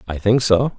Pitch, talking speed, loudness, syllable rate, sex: 110 Hz, 230 wpm, -17 LUFS, 4.8 syllables/s, male